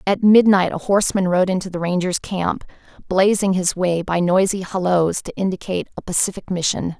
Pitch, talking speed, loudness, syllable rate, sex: 185 Hz, 170 wpm, -19 LUFS, 5.4 syllables/s, female